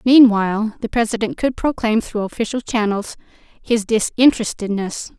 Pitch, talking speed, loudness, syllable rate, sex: 225 Hz, 115 wpm, -18 LUFS, 5.1 syllables/s, female